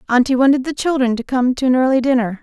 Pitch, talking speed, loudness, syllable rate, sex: 255 Hz, 245 wpm, -16 LUFS, 6.7 syllables/s, female